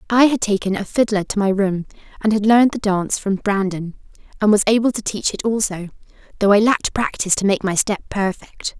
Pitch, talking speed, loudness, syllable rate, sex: 205 Hz, 210 wpm, -18 LUFS, 5.8 syllables/s, female